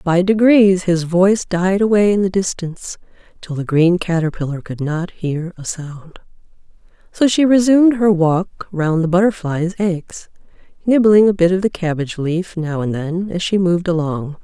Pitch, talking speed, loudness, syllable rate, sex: 180 Hz, 170 wpm, -16 LUFS, 4.7 syllables/s, female